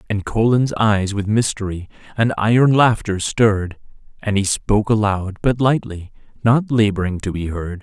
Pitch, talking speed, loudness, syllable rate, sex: 105 Hz, 155 wpm, -18 LUFS, 4.8 syllables/s, male